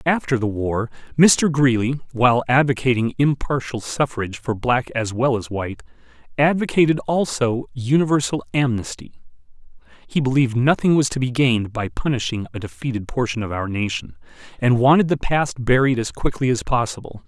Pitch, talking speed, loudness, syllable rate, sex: 125 Hz, 150 wpm, -20 LUFS, 5.4 syllables/s, male